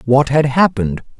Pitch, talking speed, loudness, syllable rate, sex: 135 Hz, 150 wpm, -15 LUFS, 5.3 syllables/s, male